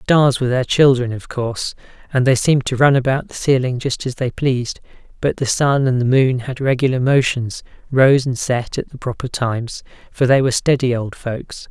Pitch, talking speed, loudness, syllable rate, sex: 130 Hz, 205 wpm, -17 LUFS, 5.3 syllables/s, male